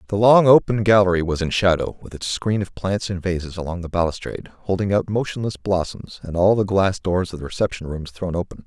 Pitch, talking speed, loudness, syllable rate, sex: 95 Hz, 220 wpm, -20 LUFS, 5.8 syllables/s, male